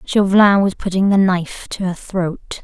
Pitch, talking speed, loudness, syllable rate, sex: 190 Hz, 180 wpm, -16 LUFS, 4.7 syllables/s, female